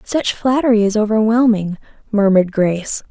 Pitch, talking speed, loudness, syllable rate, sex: 215 Hz, 115 wpm, -15 LUFS, 5.3 syllables/s, female